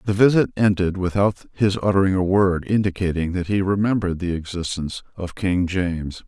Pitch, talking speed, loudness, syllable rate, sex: 95 Hz, 160 wpm, -21 LUFS, 5.5 syllables/s, male